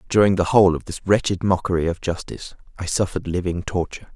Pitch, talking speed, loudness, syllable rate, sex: 90 Hz, 190 wpm, -21 LUFS, 6.7 syllables/s, male